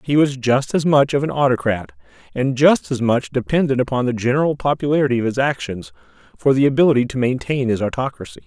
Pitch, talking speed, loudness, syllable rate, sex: 125 Hz, 190 wpm, -18 LUFS, 6.1 syllables/s, male